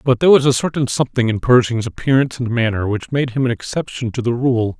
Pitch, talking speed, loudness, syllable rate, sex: 125 Hz, 240 wpm, -17 LUFS, 6.4 syllables/s, male